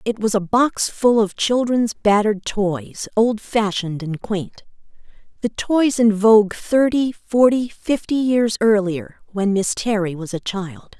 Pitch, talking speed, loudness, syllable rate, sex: 210 Hz, 135 wpm, -19 LUFS, 3.9 syllables/s, female